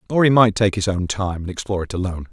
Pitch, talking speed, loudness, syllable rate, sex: 100 Hz, 285 wpm, -19 LUFS, 7.2 syllables/s, male